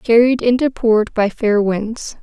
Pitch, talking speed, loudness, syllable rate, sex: 225 Hz, 160 wpm, -16 LUFS, 3.9 syllables/s, female